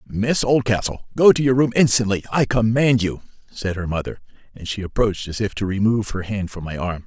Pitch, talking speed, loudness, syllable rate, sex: 110 Hz, 210 wpm, -20 LUFS, 5.8 syllables/s, male